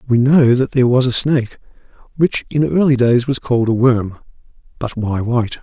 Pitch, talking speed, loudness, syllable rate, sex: 125 Hz, 190 wpm, -15 LUFS, 5.4 syllables/s, male